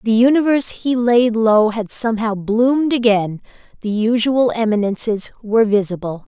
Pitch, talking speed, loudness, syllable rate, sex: 225 Hz, 120 wpm, -16 LUFS, 4.9 syllables/s, female